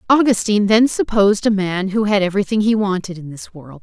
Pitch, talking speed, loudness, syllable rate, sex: 205 Hz, 205 wpm, -16 LUFS, 6.0 syllables/s, female